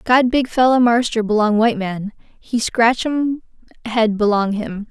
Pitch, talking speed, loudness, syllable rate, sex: 230 Hz, 160 wpm, -17 LUFS, 4.2 syllables/s, female